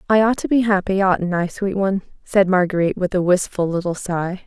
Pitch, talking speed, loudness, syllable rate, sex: 190 Hz, 200 wpm, -19 LUFS, 5.6 syllables/s, female